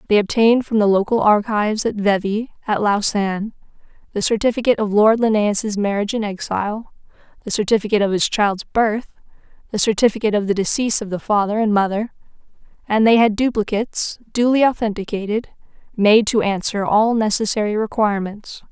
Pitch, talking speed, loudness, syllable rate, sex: 215 Hz, 145 wpm, -18 LUFS, 5.9 syllables/s, female